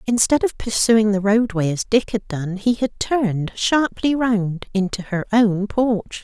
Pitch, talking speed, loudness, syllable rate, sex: 215 Hz, 175 wpm, -19 LUFS, 4.1 syllables/s, female